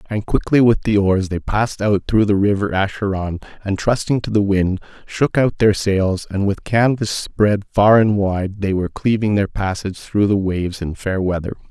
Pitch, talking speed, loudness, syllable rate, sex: 100 Hz, 200 wpm, -18 LUFS, 4.8 syllables/s, male